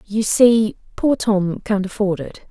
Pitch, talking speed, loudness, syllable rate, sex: 205 Hz, 170 wpm, -18 LUFS, 3.8 syllables/s, female